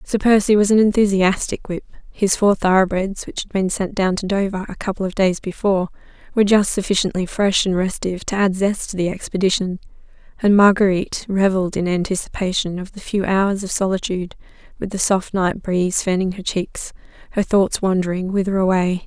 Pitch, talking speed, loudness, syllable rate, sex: 190 Hz, 180 wpm, -19 LUFS, 5.7 syllables/s, female